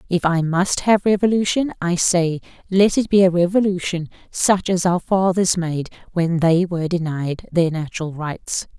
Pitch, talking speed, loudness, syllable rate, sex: 175 Hz, 165 wpm, -19 LUFS, 4.6 syllables/s, female